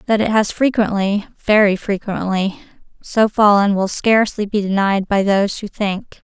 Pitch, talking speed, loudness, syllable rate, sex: 205 Hz, 150 wpm, -17 LUFS, 4.7 syllables/s, female